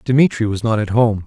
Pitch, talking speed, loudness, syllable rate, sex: 110 Hz, 240 wpm, -17 LUFS, 5.1 syllables/s, male